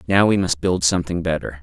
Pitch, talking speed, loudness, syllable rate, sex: 85 Hz, 220 wpm, -19 LUFS, 6.1 syllables/s, male